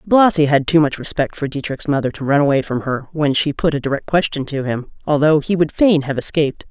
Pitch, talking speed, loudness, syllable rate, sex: 150 Hz, 240 wpm, -17 LUFS, 5.8 syllables/s, female